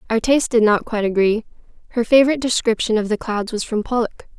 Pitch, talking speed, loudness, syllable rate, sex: 225 Hz, 205 wpm, -18 LUFS, 7.0 syllables/s, female